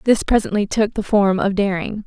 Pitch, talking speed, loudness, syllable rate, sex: 205 Hz, 205 wpm, -18 LUFS, 5.1 syllables/s, female